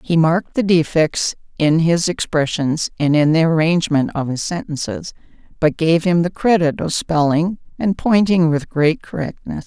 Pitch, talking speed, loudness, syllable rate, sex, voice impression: 160 Hz, 160 wpm, -17 LUFS, 4.7 syllables/s, female, feminine, very adult-like, slightly powerful, clear, slightly sincere, friendly, reassuring, slightly elegant